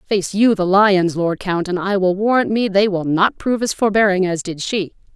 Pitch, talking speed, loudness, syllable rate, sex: 195 Hz, 235 wpm, -17 LUFS, 4.9 syllables/s, female